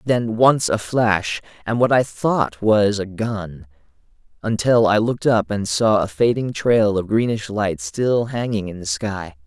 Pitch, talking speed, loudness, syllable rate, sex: 105 Hz, 180 wpm, -19 LUFS, 4.0 syllables/s, male